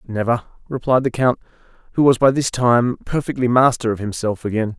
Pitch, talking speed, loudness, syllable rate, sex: 120 Hz, 175 wpm, -18 LUFS, 5.6 syllables/s, male